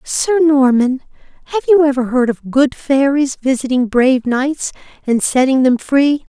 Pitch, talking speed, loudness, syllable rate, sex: 270 Hz, 150 wpm, -14 LUFS, 4.3 syllables/s, female